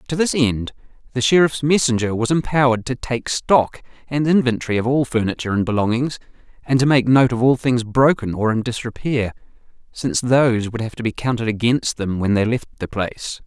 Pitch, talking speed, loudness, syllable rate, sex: 120 Hz, 190 wpm, -19 LUFS, 5.7 syllables/s, male